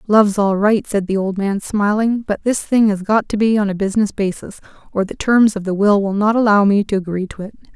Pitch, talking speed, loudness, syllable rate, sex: 205 Hz, 255 wpm, -16 LUFS, 5.7 syllables/s, female